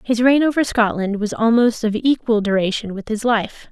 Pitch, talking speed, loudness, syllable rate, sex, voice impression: 225 Hz, 195 wpm, -18 LUFS, 5.0 syllables/s, female, feminine, adult-like, tensed, slightly powerful, bright, soft, fluent, intellectual, calm, friendly, elegant, lively, slightly kind